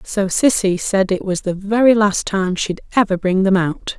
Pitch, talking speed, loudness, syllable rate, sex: 195 Hz, 210 wpm, -17 LUFS, 4.6 syllables/s, female